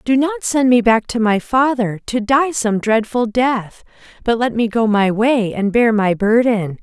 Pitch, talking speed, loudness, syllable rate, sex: 230 Hz, 200 wpm, -16 LUFS, 4.2 syllables/s, female